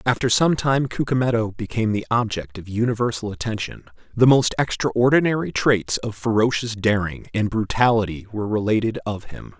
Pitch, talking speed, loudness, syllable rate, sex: 110 Hz, 145 wpm, -21 LUFS, 5.4 syllables/s, male